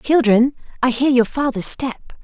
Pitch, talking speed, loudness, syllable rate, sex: 255 Hz, 160 wpm, -17 LUFS, 4.2 syllables/s, female